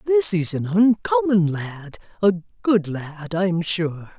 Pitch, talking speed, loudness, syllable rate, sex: 180 Hz, 145 wpm, -21 LUFS, 3.4 syllables/s, female